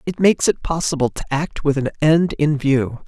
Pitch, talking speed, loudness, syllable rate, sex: 145 Hz, 215 wpm, -19 LUFS, 5.2 syllables/s, male